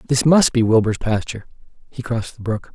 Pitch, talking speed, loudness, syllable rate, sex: 120 Hz, 195 wpm, -18 LUFS, 6.2 syllables/s, male